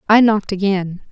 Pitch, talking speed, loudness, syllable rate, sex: 200 Hz, 160 wpm, -16 LUFS, 5.8 syllables/s, female